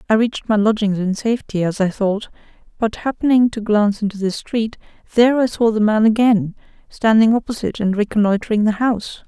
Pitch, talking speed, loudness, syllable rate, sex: 215 Hz, 180 wpm, -17 LUFS, 6.0 syllables/s, female